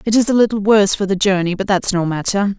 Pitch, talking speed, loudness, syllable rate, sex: 200 Hz, 280 wpm, -16 LUFS, 6.5 syllables/s, female